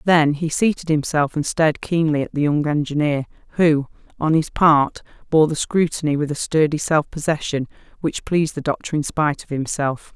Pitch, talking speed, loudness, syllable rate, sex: 155 Hz, 185 wpm, -20 LUFS, 5.2 syllables/s, female